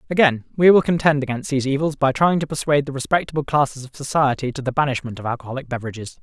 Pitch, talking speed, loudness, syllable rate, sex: 140 Hz, 210 wpm, -20 LUFS, 7.3 syllables/s, male